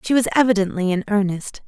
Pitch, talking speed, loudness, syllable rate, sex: 205 Hz, 180 wpm, -19 LUFS, 6.3 syllables/s, female